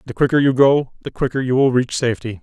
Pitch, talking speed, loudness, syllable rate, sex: 130 Hz, 250 wpm, -17 LUFS, 6.5 syllables/s, male